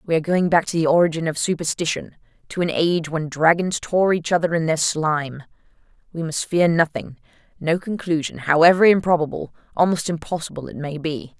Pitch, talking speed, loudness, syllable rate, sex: 165 Hz, 165 wpm, -20 LUFS, 5.7 syllables/s, female